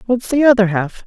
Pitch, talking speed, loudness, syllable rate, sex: 225 Hz, 225 wpm, -14 LUFS, 5.4 syllables/s, female